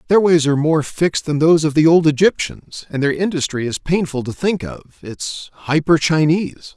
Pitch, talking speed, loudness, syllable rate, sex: 155 Hz, 195 wpm, -17 LUFS, 5.3 syllables/s, male